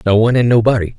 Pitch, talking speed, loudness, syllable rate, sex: 115 Hz, 245 wpm, -13 LUFS, 8.1 syllables/s, male